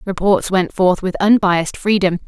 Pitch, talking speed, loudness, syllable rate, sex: 190 Hz, 160 wpm, -16 LUFS, 4.8 syllables/s, female